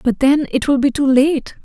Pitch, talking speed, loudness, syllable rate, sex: 275 Hz, 255 wpm, -15 LUFS, 4.9 syllables/s, female